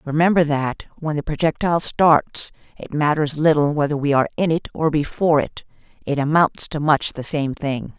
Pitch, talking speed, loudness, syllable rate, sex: 150 Hz, 180 wpm, -20 LUFS, 5.2 syllables/s, female